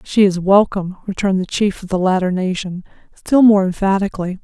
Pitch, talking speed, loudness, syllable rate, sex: 190 Hz, 175 wpm, -16 LUFS, 5.9 syllables/s, female